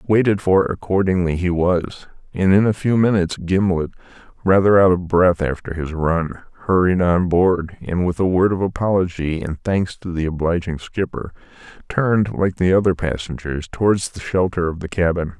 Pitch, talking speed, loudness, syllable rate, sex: 90 Hz, 170 wpm, -19 LUFS, 5.0 syllables/s, male